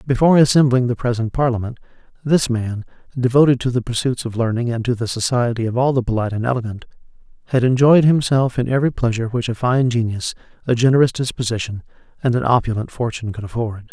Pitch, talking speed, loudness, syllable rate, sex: 120 Hz, 180 wpm, -18 LUFS, 6.6 syllables/s, male